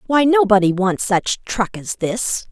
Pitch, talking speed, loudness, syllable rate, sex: 215 Hz, 165 wpm, -17 LUFS, 3.9 syllables/s, female